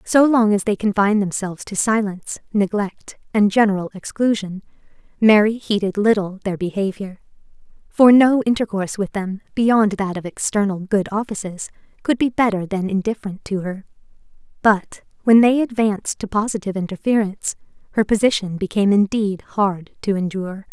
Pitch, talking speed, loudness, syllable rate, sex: 205 Hz, 140 wpm, -19 LUFS, 5.4 syllables/s, female